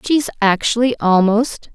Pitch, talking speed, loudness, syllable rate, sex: 225 Hz, 105 wpm, -16 LUFS, 4.1 syllables/s, female